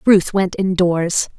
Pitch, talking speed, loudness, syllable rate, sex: 185 Hz, 130 wpm, -17 LUFS, 3.4 syllables/s, female